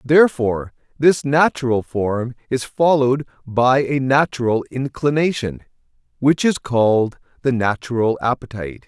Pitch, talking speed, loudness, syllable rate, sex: 125 Hz, 110 wpm, -19 LUFS, 4.6 syllables/s, male